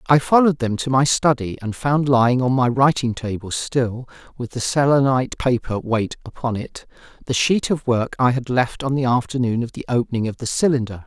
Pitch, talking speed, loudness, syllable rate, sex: 125 Hz, 200 wpm, -20 LUFS, 5.3 syllables/s, male